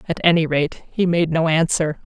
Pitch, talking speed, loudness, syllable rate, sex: 165 Hz, 200 wpm, -19 LUFS, 4.9 syllables/s, female